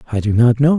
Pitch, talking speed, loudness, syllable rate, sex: 125 Hz, 305 wpm, -14 LUFS, 6.7 syllables/s, male